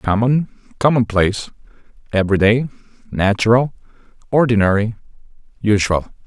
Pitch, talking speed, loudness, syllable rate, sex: 110 Hz, 55 wpm, -17 LUFS, 5.3 syllables/s, male